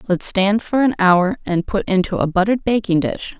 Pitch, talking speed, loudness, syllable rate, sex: 195 Hz, 210 wpm, -17 LUFS, 5.2 syllables/s, female